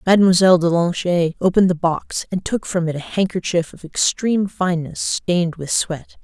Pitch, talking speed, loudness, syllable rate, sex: 175 Hz, 175 wpm, -19 LUFS, 5.4 syllables/s, female